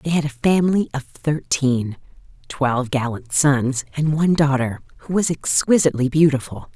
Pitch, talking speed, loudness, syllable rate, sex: 140 Hz, 135 wpm, -19 LUFS, 5.1 syllables/s, female